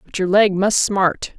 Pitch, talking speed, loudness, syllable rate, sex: 195 Hz, 215 wpm, -17 LUFS, 4.0 syllables/s, female